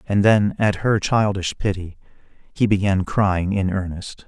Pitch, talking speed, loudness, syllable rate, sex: 100 Hz, 155 wpm, -20 LUFS, 4.1 syllables/s, male